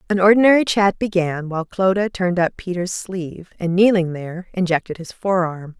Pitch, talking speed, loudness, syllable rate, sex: 185 Hz, 175 wpm, -19 LUFS, 5.5 syllables/s, female